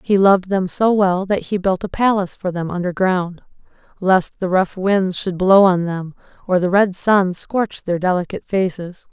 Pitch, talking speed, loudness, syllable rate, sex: 185 Hz, 190 wpm, -18 LUFS, 4.7 syllables/s, female